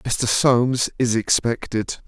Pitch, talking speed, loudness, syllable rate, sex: 120 Hz, 115 wpm, -20 LUFS, 3.6 syllables/s, male